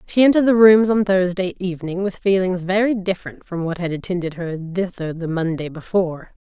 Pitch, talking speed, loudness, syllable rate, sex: 185 Hz, 185 wpm, -19 LUFS, 5.8 syllables/s, female